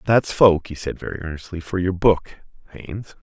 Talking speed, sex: 180 wpm, male